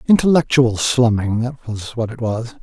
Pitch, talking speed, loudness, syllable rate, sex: 120 Hz, 160 wpm, -17 LUFS, 4.5 syllables/s, male